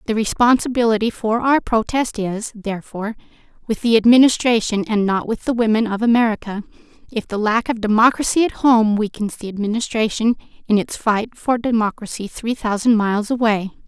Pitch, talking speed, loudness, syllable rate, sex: 225 Hz, 155 wpm, -18 LUFS, 5.5 syllables/s, female